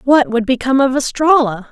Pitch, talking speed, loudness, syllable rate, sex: 260 Hz, 175 wpm, -14 LUFS, 5.6 syllables/s, female